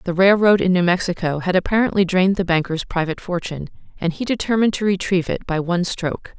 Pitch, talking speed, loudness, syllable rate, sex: 180 Hz, 195 wpm, -19 LUFS, 6.7 syllables/s, female